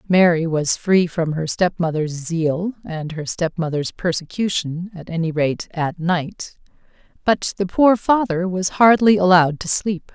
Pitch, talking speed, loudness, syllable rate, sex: 175 Hz, 140 wpm, -19 LUFS, 4.2 syllables/s, female